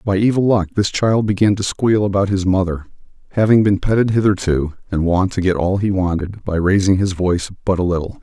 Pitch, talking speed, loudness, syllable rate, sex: 95 Hz, 210 wpm, -17 LUFS, 5.7 syllables/s, male